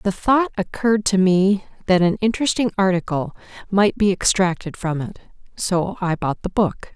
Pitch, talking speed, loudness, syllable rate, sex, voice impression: 190 Hz, 165 wpm, -20 LUFS, 4.9 syllables/s, female, feminine, adult-like, tensed, slightly soft, fluent, slightly raspy, calm, reassuring, elegant, slightly sharp, modest